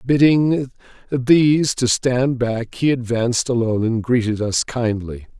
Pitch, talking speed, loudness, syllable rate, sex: 125 Hz, 135 wpm, -18 LUFS, 4.3 syllables/s, male